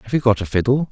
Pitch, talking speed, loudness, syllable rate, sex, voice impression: 120 Hz, 330 wpm, -18 LUFS, 7.4 syllables/s, male, masculine, adult-like, tensed, powerful, slightly muffled, slightly raspy, intellectual, calm, slightly mature, slightly reassuring, wild, slightly strict